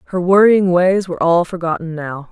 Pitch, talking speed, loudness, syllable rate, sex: 175 Hz, 180 wpm, -15 LUFS, 5.4 syllables/s, female